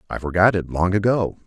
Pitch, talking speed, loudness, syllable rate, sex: 95 Hz, 205 wpm, -20 LUFS, 5.9 syllables/s, male